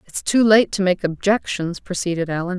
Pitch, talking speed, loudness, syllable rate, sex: 190 Hz, 185 wpm, -19 LUFS, 5.2 syllables/s, female